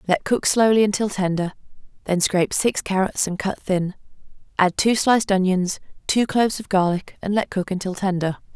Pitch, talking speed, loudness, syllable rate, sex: 195 Hz, 175 wpm, -21 LUFS, 5.3 syllables/s, female